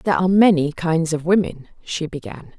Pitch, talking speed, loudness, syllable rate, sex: 165 Hz, 185 wpm, -19 LUFS, 5.4 syllables/s, female